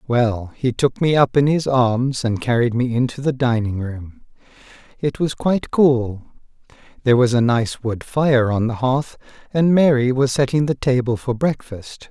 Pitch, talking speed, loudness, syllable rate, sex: 125 Hz, 180 wpm, -19 LUFS, 4.5 syllables/s, male